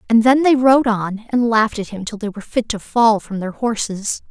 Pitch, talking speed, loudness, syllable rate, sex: 225 Hz, 250 wpm, -17 LUFS, 5.2 syllables/s, female